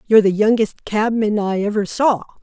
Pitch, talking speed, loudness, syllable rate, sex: 210 Hz, 175 wpm, -18 LUFS, 5.1 syllables/s, female